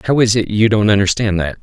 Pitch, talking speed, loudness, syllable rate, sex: 105 Hz, 260 wpm, -14 LUFS, 6.2 syllables/s, male